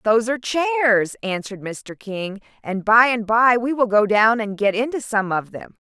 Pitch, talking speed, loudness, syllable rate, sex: 225 Hz, 205 wpm, -19 LUFS, 4.6 syllables/s, female